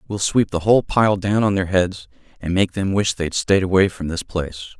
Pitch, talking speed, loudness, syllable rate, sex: 95 Hz, 240 wpm, -19 LUFS, 5.3 syllables/s, male